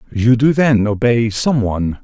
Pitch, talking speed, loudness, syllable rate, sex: 115 Hz, 175 wpm, -15 LUFS, 4.5 syllables/s, male